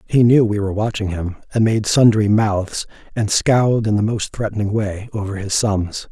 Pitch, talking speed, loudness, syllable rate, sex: 105 Hz, 195 wpm, -18 LUFS, 4.9 syllables/s, male